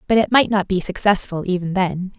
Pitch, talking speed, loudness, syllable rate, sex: 195 Hz, 220 wpm, -19 LUFS, 5.5 syllables/s, female